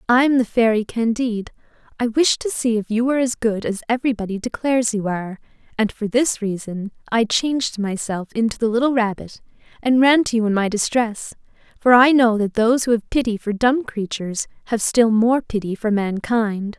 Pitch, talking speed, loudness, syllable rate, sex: 225 Hz, 195 wpm, -19 LUFS, 5.4 syllables/s, female